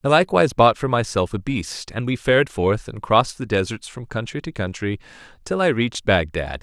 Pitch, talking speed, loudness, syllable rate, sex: 115 Hz, 210 wpm, -21 LUFS, 5.6 syllables/s, male